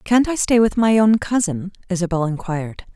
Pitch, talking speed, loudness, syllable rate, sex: 195 Hz, 180 wpm, -18 LUFS, 5.2 syllables/s, female